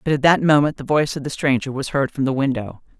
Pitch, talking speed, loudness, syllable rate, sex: 140 Hz, 280 wpm, -19 LUFS, 6.5 syllables/s, female